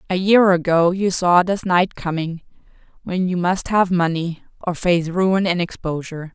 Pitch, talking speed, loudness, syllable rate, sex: 180 Hz, 160 wpm, -19 LUFS, 4.5 syllables/s, female